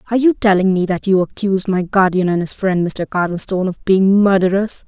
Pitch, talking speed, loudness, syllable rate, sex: 190 Hz, 195 wpm, -16 LUFS, 5.8 syllables/s, female